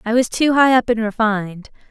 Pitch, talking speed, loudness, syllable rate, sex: 230 Hz, 220 wpm, -16 LUFS, 5.5 syllables/s, female